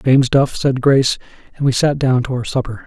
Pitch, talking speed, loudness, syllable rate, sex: 130 Hz, 230 wpm, -16 LUFS, 5.7 syllables/s, male